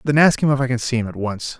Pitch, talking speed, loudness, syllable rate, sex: 125 Hz, 375 wpm, -19 LUFS, 6.7 syllables/s, male